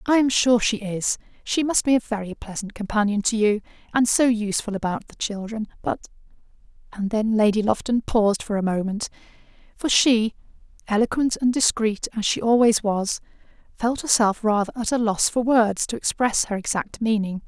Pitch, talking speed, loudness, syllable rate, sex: 220 Hz, 175 wpm, -22 LUFS, 5.2 syllables/s, female